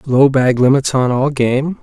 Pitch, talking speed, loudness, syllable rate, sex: 135 Hz, 195 wpm, -14 LUFS, 4.1 syllables/s, male